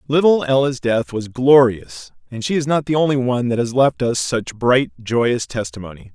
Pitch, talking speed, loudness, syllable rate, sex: 120 Hz, 195 wpm, -18 LUFS, 4.9 syllables/s, male